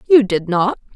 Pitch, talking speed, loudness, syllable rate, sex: 215 Hz, 190 wpm, -16 LUFS, 4.7 syllables/s, female